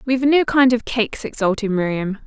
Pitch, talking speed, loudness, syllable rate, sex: 230 Hz, 210 wpm, -18 LUFS, 6.2 syllables/s, female